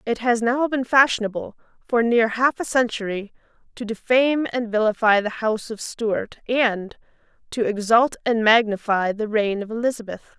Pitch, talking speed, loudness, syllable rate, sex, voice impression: 230 Hz, 155 wpm, -21 LUFS, 4.8 syllables/s, female, very feminine, slightly young, very thin, tensed, slightly powerful, bright, hard, slightly muffled, fluent, cute, intellectual, very refreshing, sincere, calm, slightly friendly, slightly reassuring, unique, elegant, slightly wild, slightly sweet, slightly lively, kind, modest, slightly light